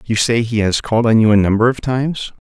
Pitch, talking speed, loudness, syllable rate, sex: 115 Hz, 265 wpm, -15 LUFS, 6.2 syllables/s, male